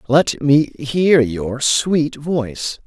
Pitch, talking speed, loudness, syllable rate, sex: 140 Hz, 125 wpm, -17 LUFS, 2.6 syllables/s, male